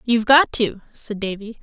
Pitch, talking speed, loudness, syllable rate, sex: 220 Hz, 185 wpm, -18 LUFS, 5.0 syllables/s, female